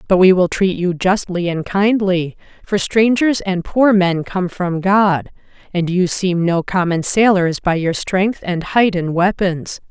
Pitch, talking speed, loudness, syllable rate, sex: 185 Hz, 175 wpm, -16 LUFS, 3.9 syllables/s, female